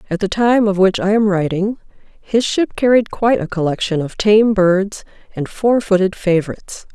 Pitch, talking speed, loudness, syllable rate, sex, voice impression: 200 Hz, 180 wpm, -16 LUFS, 5.0 syllables/s, female, very feminine, adult-like, slightly middle-aged, slightly thin, slightly relaxed, slightly weak, slightly dark, soft, clear, fluent, slightly cute, intellectual, slightly refreshing, sincere, slightly calm, elegant, slightly sweet, lively, kind, slightly modest